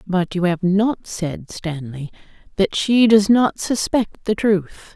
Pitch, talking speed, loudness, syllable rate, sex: 195 Hz, 160 wpm, -19 LUFS, 3.5 syllables/s, female